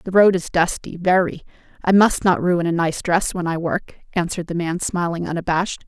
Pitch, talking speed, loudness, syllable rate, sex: 175 Hz, 205 wpm, -20 LUFS, 5.4 syllables/s, female